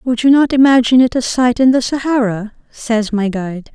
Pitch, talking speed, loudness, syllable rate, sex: 240 Hz, 210 wpm, -13 LUFS, 5.3 syllables/s, female